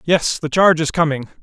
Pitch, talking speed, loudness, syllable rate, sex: 160 Hz, 210 wpm, -16 LUFS, 5.8 syllables/s, male